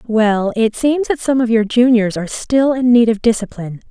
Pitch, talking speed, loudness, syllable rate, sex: 235 Hz, 215 wpm, -15 LUFS, 5.2 syllables/s, female